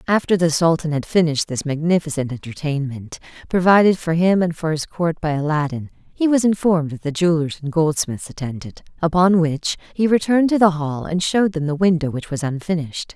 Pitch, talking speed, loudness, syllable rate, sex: 165 Hz, 185 wpm, -19 LUFS, 5.8 syllables/s, female